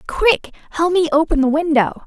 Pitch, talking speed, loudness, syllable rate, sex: 315 Hz, 175 wpm, -16 LUFS, 5.1 syllables/s, female